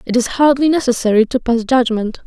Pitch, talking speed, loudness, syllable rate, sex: 245 Hz, 185 wpm, -15 LUFS, 5.7 syllables/s, female